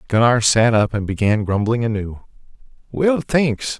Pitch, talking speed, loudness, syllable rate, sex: 115 Hz, 140 wpm, -18 LUFS, 4.3 syllables/s, male